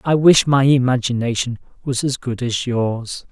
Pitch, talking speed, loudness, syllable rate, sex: 125 Hz, 165 wpm, -18 LUFS, 4.4 syllables/s, male